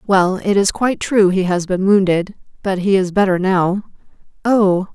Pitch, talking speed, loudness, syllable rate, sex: 190 Hz, 180 wpm, -16 LUFS, 4.5 syllables/s, female